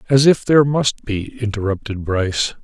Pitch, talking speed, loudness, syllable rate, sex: 115 Hz, 160 wpm, -18 LUFS, 5.0 syllables/s, male